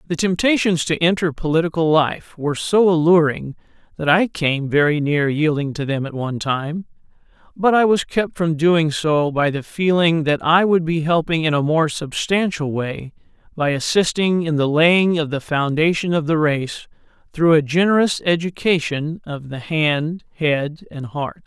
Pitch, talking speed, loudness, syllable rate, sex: 160 Hz, 170 wpm, -18 LUFS, 4.5 syllables/s, male